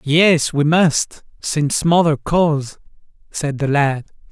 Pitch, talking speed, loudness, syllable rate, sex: 150 Hz, 125 wpm, -17 LUFS, 3.3 syllables/s, male